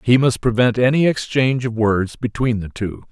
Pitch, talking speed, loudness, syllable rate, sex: 120 Hz, 195 wpm, -18 LUFS, 5.1 syllables/s, male